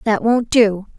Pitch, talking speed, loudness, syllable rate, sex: 220 Hz, 185 wpm, -16 LUFS, 3.8 syllables/s, female